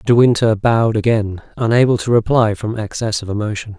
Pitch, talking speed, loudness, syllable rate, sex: 110 Hz, 175 wpm, -16 LUFS, 5.5 syllables/s, male